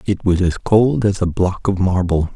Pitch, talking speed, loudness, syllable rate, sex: 95 Hz, 230 wpm, -17 LUFS, 4.6 syllables/s, male